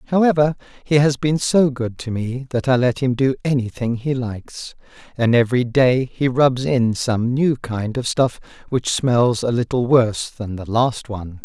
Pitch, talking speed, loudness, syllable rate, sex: 125 Hz, 195 wpm, -19 LUFS, 4.5 syllables/s, male